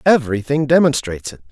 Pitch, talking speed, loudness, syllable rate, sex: 135 Hz, 120 wpm, -16 LUFS, 6.8 syllables/s, male